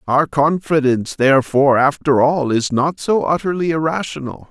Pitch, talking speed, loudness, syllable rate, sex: 145 Hz, 135 wpm, -16 LUFS, 5.0 syllables/s, male